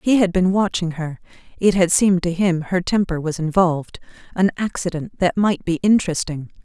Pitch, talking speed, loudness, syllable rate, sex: 180 Hz, 170 wpm, -19 LUFS, 5.3 syllables/s, female